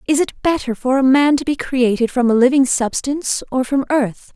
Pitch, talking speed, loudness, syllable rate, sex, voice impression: 260 Hz, 220 wpm, -17 LUFS, 5.2 syllables/s, female, feminine, adult-like, relaxed, soft, fluent, slightly cute, calm, friendly, reassuring, elegant, lively, kind